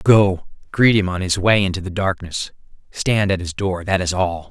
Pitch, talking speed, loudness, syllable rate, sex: 95 Hz, 200 wpm, -19 LUFS, 4.7 syllables/s, male